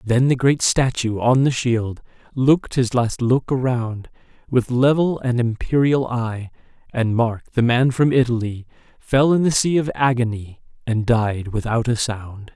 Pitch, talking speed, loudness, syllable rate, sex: 120 Hz, 165 wpm, -19 LUFS, 4.2 syllables/s, male